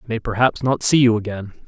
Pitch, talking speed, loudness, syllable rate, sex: 115 Hz, 250 wpm, -18 LUFS, 6.4 syllables/s, male